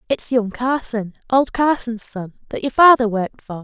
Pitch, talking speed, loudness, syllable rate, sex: 235 Hz, 180 wpm, -18 LUFS, 4.7 syllables/s, female